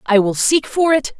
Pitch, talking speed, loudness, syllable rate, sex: 250 Hz, 250 wpm, -16 LUFS, 4.7 syllables/s, female